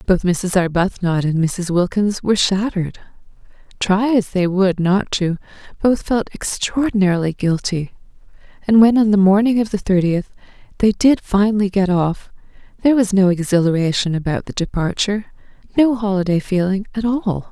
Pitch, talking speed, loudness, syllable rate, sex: 195 Hz, 145 wpm, -17 LUFS, 5.1 syllables/s, female